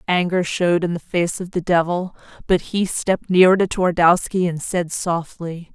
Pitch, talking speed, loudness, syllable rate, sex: 175 Hz, 180 wpm, -19 LUFS, 4.8 syllables/s, female